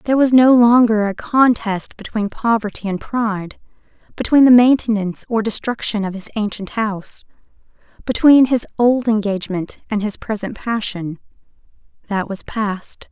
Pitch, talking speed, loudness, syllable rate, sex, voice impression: 220 Hz, 135 wpm, -17 LUFS, 4.9 syllables/s, female, feminine, slightly adult-like, soft, slightly halting, intellectual, friendly